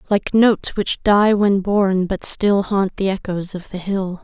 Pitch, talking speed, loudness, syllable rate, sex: 195 Hz, 200 wpm, -18 LUFS, 4.0 syllables/s, female